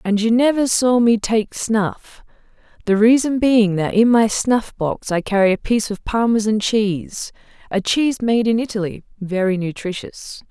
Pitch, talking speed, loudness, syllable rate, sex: 215 Hz, 160 wpm, -18 LUFS, 4.6 syllables/s, female